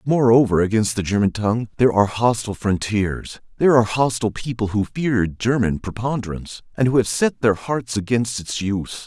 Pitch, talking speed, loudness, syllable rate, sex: 110 Hz, 170 wpm, -20 LUFS, 5.6 syllables/s, male